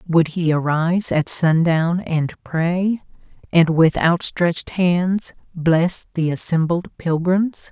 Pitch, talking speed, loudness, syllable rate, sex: 170 Hz, 115 wpm, -19 LUFS, 3.4 syllables/s, female